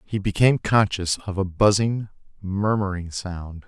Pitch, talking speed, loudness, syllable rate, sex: 100 Hz, 130 wpm, -22 LUFS, 4.4 syllables/s, male